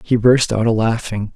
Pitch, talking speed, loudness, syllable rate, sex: 115 Hz, 220 wpm, -16 LUFS, 4.8 syllables/s, male